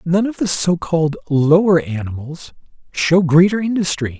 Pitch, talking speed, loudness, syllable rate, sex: 165 Hz, 130 wpm, -16 LUFS, 4.7 syllables/s, male